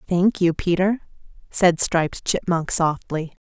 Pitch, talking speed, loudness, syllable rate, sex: 175 Hz, 120 wpm, -21 LUFS, 4.0 syllables/s, female